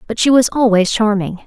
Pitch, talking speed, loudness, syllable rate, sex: 220 Hz, 205 wpm, -14 LUFS, 5.4 syllables/s, female